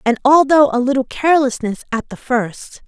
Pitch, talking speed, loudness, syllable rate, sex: 260 Hz, 190 wpm, -15 LUFS, 5.1 syllables/s, female